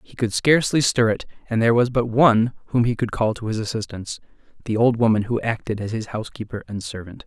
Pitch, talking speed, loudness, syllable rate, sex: 115 Hz, 215 wpm, -21 LUFS, 6.4 syllables/s, male